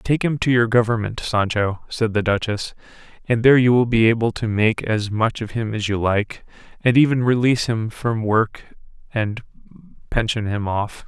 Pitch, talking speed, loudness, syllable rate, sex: 115 Hz, 185 wpm, -20 LUFS, 4.8 syllables/s, male